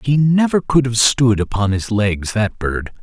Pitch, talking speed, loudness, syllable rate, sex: 115 Hz, 200 wpm, -16 LUFS, 4.2 syllables/s, male